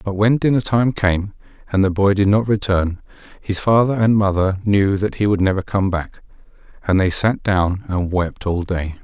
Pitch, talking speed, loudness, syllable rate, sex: 100 Hz, 200 wpm, -18 LUFS, 4.7 syllables/s, male